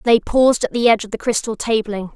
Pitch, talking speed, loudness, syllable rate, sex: 225 Hz, 250 wpm, -17 LUFS, 6.2 syllables/s, female